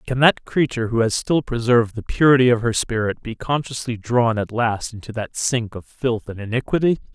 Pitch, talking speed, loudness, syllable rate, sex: 120 Hz, 200 wpm, -20 LUFS, 5.4 syllables/s, male